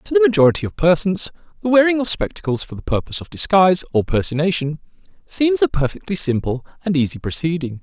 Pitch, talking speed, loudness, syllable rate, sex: 175 Hz, 175 wpm, -18 LUFS, 6.4 syllables/s, male